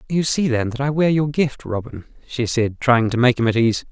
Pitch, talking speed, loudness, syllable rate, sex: 125 Hz, 260 wpm, -19 LUFS, 5.2 syllables/s, male